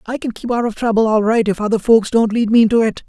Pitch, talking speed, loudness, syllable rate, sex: 225 Hz, 310 wpm, -15 LUFS, 6.4 syllables/s, male